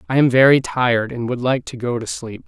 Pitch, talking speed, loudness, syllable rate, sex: 125 Hz, 265 wpm, -18 LUFS, 5.8 syllables/s, male